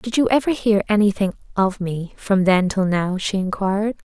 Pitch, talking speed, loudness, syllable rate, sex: 200 Hz, 190 wpm, -20 LUFS, 5.0 syllables/s, female